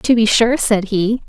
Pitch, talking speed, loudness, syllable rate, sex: 220 Hz, 235 wpm, -15 LUFS, 4.1 syllables/s, female